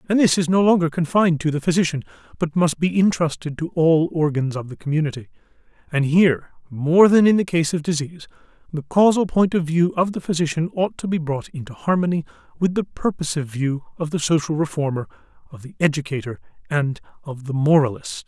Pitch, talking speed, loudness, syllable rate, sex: 160 Hz, 185 wpm, -20 LUFS, 5.9 syllables/s, male